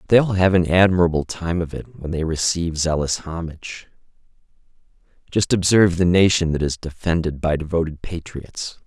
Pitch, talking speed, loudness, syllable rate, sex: 85 Hz, 155 wpm, -20 LUFS, 5.4 syllables/s, male